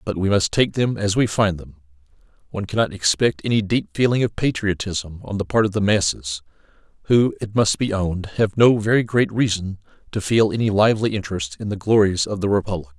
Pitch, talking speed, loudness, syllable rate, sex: 100 Hz, 205 wpm, -20 LUFS, 5.8 syllables/s, male